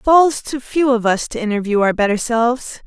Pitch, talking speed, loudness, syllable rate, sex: 240 Hz, 230 wpm, -17 LUFS, 5.4 syllables/s, female